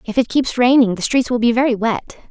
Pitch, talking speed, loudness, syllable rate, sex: 240 Hz, 260 wpm, -16 LUFS, 5.6 syllables/s, female